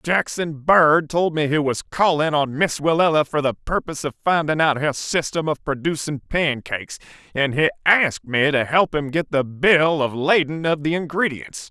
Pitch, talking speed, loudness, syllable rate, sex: 155 Hz, 185 wpm, -20 LUFS, 4.8 syllables/s, male